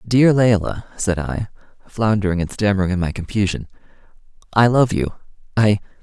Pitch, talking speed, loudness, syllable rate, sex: 100 Hz, 140 wpm, -19 LUFS, 5.2 syllables/s, male